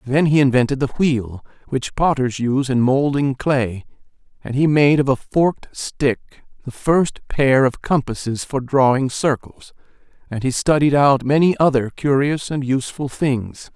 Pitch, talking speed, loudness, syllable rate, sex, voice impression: 135 Hz, 155 wpm, -18 LUFS, 4.5 syllables/s, male, very masculine, very adult-like, very middle-aged, very thick, tensed, slightly powerful, slightly bright, slightly hard, very clear, fluent, cool, very intellectual, slightly refreshing, sincere, calm, friendly, very reassuring, unique, slightly elegant, wild, sweet, slightly lively, very kind